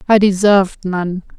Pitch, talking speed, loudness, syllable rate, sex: 190 Hz, 130 wpm, -15 LUFS, 4.6 syllables/s, female